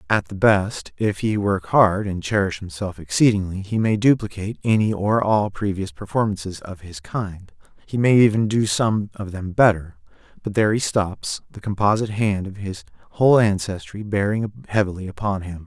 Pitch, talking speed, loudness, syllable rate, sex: 100 Hz, 170 wpm, -21 LUFS, 5.0 syllables/s, male